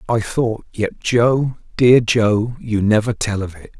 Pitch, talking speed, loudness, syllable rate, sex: 110 Hz, 175 wpm, -17 LUFS, 3.7 syllables/s, male